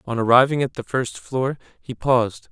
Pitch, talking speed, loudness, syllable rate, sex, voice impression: 125 Hz, 190 wpm, -20 LUFS, 5.1 syllables/s, male, masculine, adult-like, slightly halting, sincere, slightly calm, friendly